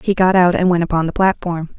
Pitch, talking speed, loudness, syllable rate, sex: 175 Hz, 270 wpm, -16 LUFS, 6.1 syllables/s, female